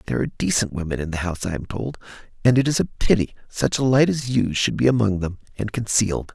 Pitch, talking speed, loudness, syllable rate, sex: 110 Hz, 245 wpm, -22 LUFS, 6.5 syllables/s, male